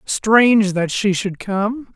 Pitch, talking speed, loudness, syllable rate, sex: 205 Hz, 155 wpm, -17 LUFS, 3.3 syllables/s, male